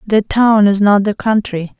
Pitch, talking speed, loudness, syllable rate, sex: 205 Hz, 200 wpm, -13 LUFS, 4.1 syllables/s, female